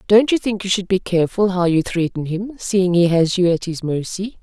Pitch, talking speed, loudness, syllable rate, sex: 185 Hz, 245 wpm, -18 LUFS, 5.3 syllables/s, female